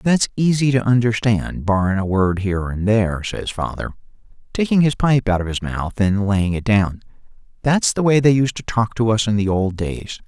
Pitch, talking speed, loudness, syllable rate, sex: 110 Hz, 210 wpm, -19 LUFS, 5.0 syllables/s, male